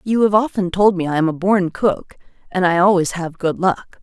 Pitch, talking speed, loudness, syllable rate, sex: 185 Hz, 240 wpm, -17 LUFS, 5.1 syllables/s, female